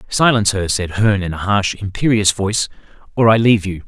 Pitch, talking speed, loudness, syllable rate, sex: 100 Hz, 200 wpm, -16 LUFS, 6.2 syllables/s, male